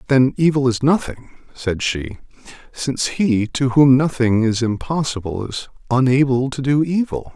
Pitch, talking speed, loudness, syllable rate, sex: 130 Hz, 145 wpm, -18 LUFS, 4.5 syllables/s, male